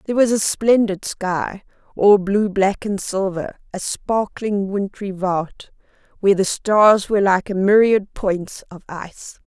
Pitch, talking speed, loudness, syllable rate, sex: 200 Hz, 145 wpm, -18 LUFS, 4.0 syllables/s, female